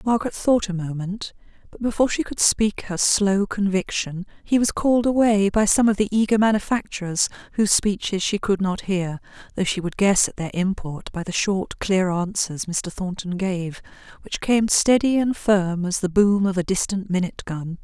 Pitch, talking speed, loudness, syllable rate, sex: 195 Hz, 185 wpm, -21 LUFS, 4.9 syllables/s, female